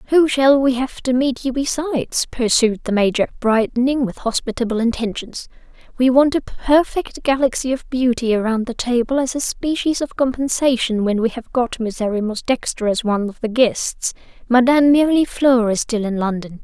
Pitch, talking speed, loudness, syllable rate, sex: 245 Hz, 165 wpm, -18 LUFS, 5.0 syllables/s, female